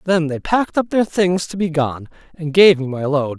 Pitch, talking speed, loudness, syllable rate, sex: 165 Hz, 250 wpm, -17 LUFS, 5.0 syllables/s, male